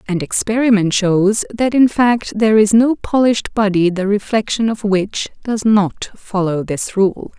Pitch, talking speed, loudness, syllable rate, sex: 210 Hz, 165 wpm, -15 LUFS, 4.3 syllables/s, female